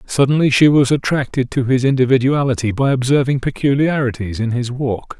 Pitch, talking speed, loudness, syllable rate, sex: 130 Hz, 150 wpm, -16 LUFS, 5.5 syllables/s, male